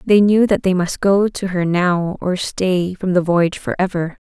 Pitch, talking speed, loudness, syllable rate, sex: 185 Hz, 225 wpm, -17 LUFS, 4.5 syllables/s, female